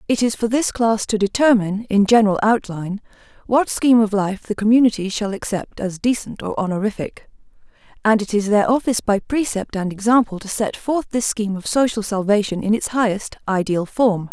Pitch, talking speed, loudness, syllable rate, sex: 215 Hz, 185 wpm, -19 LUFS, 5.5 syllables/s, female